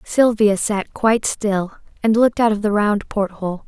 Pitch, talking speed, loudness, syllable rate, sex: 210 Hz, 195 wpm, -18 LUFS, 4.6 syllables/s, female